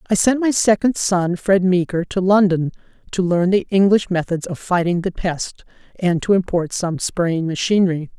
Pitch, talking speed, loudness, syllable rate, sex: 185 Hz, 175 wpm, -18 LUFS, 4.6 syllables/s, female